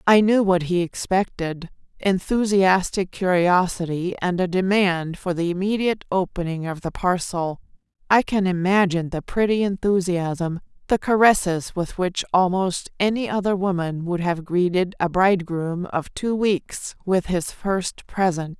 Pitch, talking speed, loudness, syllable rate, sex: 185 Hz, 135 wpm, -22 LUFS, 4.4 syllables/s, female